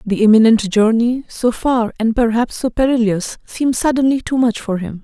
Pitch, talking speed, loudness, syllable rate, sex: 230 Hz, 180 wpm, -15 LUFS, 5.1 syllables/s, female